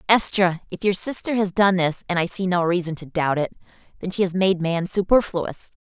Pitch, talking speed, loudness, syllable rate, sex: 180 Hz, 205 wpm, -21 LUFS, 5.3 syllables/s, female